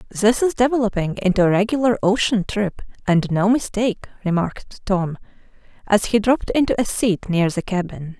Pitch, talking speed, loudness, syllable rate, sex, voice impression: 205 Hz, 160 wpm, -20 LUFS, 5.4 syllables/s, female, feminine, adult-like, tensed, slightly powerful, slightly bright, slightly soft, slightly raspy, intellectual, calm, friendly, reassuring, elegant